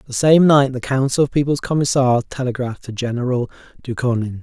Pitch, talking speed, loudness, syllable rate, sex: 130 Hz, 165 wpm, -18 LUFS, 5.9 syllables/s, male